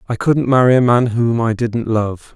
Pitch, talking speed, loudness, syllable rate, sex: 120 Hz, 230 wpm, -15 LUFS, 4.6 syllables/s, male